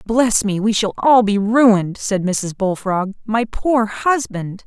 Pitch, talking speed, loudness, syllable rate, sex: 215 Hz, 165 wpm, -17 LUFS, 3.8 syllables/s, female